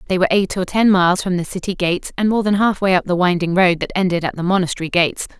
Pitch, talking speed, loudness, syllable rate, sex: 185 Hz, 280 wpm, -17 LUFS, 7.0 syllables/s, female